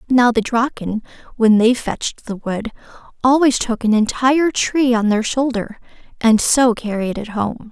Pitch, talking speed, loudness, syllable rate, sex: 235 Hz, 165 wpm, -17 LUFS, 4.5 syllables/s, female